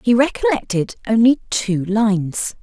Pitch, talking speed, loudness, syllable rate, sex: 225 Hz, 115 wpm, -18 LUFS, 4.4 syllables/s, female